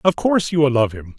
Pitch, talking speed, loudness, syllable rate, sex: 145 Hz, 305 wpm, -18 LUFS, 6.5 syllables/s, male